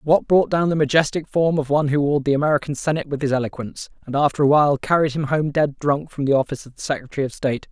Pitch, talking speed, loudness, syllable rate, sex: 145 Hz, 250 wpm, -20 LUFS, 6.9 syllables/s, male